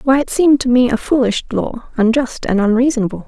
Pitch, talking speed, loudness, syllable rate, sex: 250 Hz, 200 wpm, -15 LUFS, 5.9 syllables/s, female